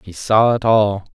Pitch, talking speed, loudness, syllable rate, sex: 105 Hz, 210 wpm, -16 LUFS, 4.1 syllables/s, male